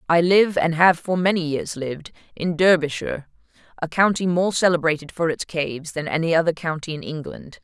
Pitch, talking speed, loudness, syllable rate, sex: 165 Hz, 180 wpm, -21 LUFS, 5.5 syllables/s, female